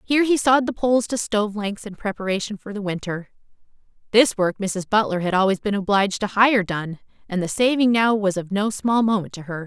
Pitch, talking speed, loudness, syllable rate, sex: 205 Hz, 215 wpm, -21 LUFS, 5.9 syllables/s, female